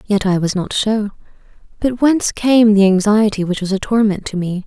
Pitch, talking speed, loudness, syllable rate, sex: 205 Hz, 205 wpm, -15 LUFS, 5.2 syllables/s, female